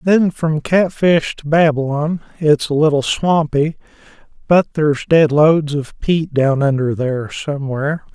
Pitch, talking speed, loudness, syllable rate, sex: 150 Hz, 140 wpm, -16 LUFS, 4.3 syllables/s, male